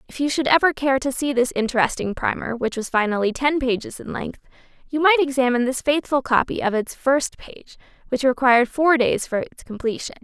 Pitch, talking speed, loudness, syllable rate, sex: 265 Hz, 200 wpm, -21 LUFS, 5.5 syllables/s, female